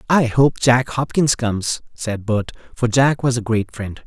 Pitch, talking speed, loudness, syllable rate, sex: 120 Hz, 190 wpm, -18 LUFS, 4.3 syllables/s, male